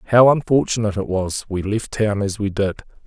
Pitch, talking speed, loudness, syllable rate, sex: 105 Hz, 195 wpm, -19 LUFS, 5.6 syllables/s, male